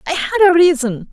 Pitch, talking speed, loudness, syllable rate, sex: 320 Hz, 215 wpm, -13 LUFS, 5.4 syllables/s, female